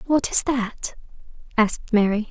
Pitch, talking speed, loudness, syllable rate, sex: 230 Hz, 130 wpm, -21 LUFS, 4.5 syllables/s, female